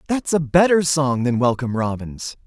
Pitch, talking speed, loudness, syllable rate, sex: 140 Hz, 170 wpm, -19 LUFS, 5.0 syllables/s, male